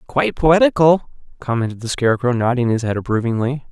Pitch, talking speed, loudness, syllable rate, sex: 125 Hz, 145 wpm, -17 LUFS, 6.2 syllables/s, male